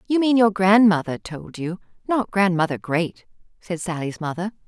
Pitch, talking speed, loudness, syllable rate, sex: 190 Hz, 155 wpm, -21 LUFS, 4.8 syllables/s, female